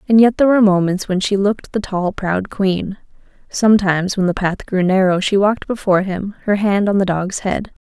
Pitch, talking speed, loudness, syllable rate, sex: 195 Hz, 215 wpm, -16 LUFS, 5.6 syllables/s, female